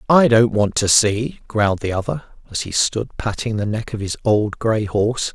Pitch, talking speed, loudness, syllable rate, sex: 110 Hz, 215 wpm, -19 LUFS, 4.8 syllables/s, male